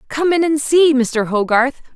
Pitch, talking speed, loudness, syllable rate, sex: 275 Hz, 185 wpm, -15 LUFS, 4.0 syllables/s, female